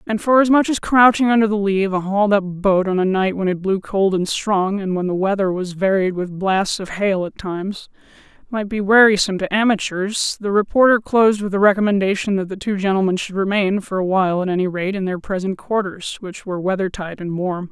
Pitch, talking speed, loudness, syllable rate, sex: 195 Hz, 225 wpm, -18 LUFS, 5.6 syllables/s, female